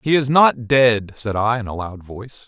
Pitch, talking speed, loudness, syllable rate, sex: 115 Hz, 245 wpm, -17 LUFS, 4.6 syllables/s, male